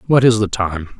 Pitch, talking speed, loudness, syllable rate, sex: 105 Hz, 240 wpm, -16 LUFS, 5.5 syllables/s, male